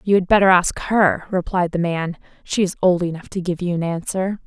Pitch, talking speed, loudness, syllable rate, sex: 180 Hz, 230 wpm, -19 LUFS, 5.2 syllables/s, female